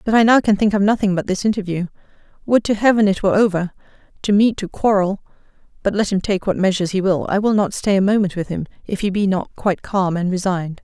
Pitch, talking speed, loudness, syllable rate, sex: 195 Hz, 225 wpm, -18 LUFS, 6.4 syllables/s, female